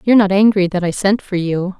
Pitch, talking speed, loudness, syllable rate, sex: 195 Hz, 265 wpm, -15 LUFS, 5.9 syllables/s, female